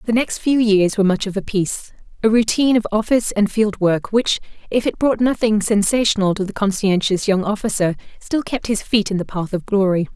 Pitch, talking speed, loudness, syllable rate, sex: 210 Hz, 205 wpm, -18 LUFS, 5.6 syllables/s, female